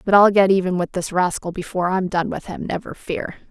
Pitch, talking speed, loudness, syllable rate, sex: 185 Hz, 240 wpm, -20 LUFS, 6.1 syllables/s, female